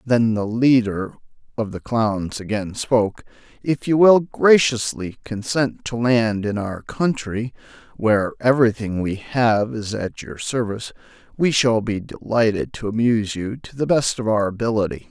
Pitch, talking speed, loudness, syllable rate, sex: 115 Hz, 155 wpm, -20 LUFS, 4.5 syllables/s, male